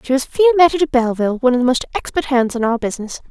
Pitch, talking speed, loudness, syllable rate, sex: 265 Hz, 255 wpm, -16 LUFS, 8.4 syllables/s, female